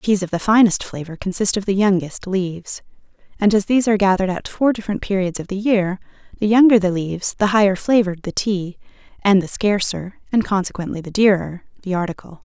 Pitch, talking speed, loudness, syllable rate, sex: 195 Hz, 190 wpm, -18 LUFS, 6.0 syllables/s, female